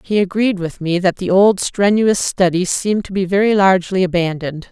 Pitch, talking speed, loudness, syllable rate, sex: 190 Hz, 190 wpm, -16 LUFS, 5.2 syllables/s, female